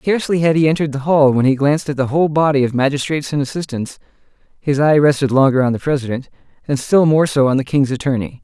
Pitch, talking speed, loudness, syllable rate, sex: 140 Hz, 230 wpm, -16 LUFS, 6.8 syllables/s, male